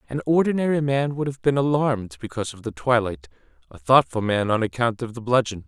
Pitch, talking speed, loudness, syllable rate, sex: 125 Hz, 200 wpm, -22 LUFS, 6.0 syllables/s, male